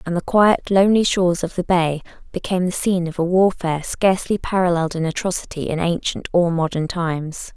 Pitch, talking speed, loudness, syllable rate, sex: 175 Hz, 185 wpm, -19 LUFS, 6.0 syllables/s, female